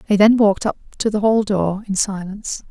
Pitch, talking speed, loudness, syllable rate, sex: 205 Hz, 220 wpm, -18 LUFS, 5.8 syllables/s, female